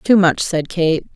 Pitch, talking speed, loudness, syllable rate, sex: 175 Hz, 210 wpm, -17 LUFS, 3.8 syllables/s, female